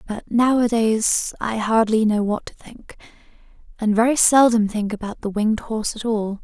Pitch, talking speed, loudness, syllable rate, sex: 220 Hz, 170 wpm, -19 LUFS, 4.8 syllables/s, female